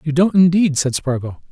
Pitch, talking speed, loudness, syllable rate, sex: 155 Hz, 200 wpm, -16 LUFS, 5.2 syllables/s, male